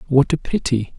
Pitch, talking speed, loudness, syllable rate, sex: 140 Hz, 185 wpm, -20 LUFS, 5.3 syllables/s, male